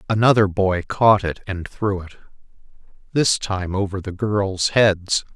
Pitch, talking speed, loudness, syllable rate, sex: 100 Hz, 145 wpm, -20 LUFS, 3.9 syllables/s, male